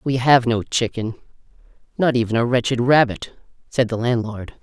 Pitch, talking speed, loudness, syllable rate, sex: 120 Hz, 145 wpm, -19 LUFS, 5.0 syllables/s, female